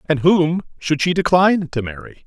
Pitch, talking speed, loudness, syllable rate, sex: 160 Hz, 185 wpm, -17 LUFS, 5.0 syllables/s, male